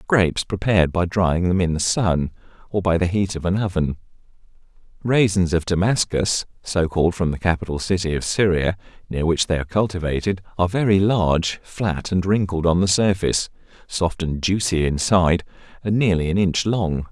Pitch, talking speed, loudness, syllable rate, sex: 90 Hz, 170 wpm, -20 LUFS, 5.3 syllables/s, male